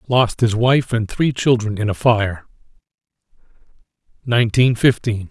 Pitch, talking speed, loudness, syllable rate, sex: 115 Hz, 125 wpm, -17 LUFS, 4.5 syllables/s, male